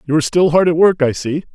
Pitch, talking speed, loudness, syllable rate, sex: 160 Hz, 310 wpm, -14 LUFS, 6.9 syllables/s, male